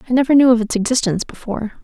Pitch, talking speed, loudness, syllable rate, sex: 235 Hz, 230 wpm, -16 LUFS, 8.6 syllables/s, female